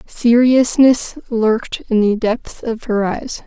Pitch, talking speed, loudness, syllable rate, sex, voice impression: 230 Hz, 140 wpm, -16 LUFS, 3.5 syllables/s, female, very feminine, slightly young, very thin, relaxed, slightly weak, dark, very soft, slightly muffled, fluent, very cute, very intellectual, slightly refreshing, very sincere, very calm, very friendly, very reassuring, very unique, very elegant, very sweet, very kind, very modest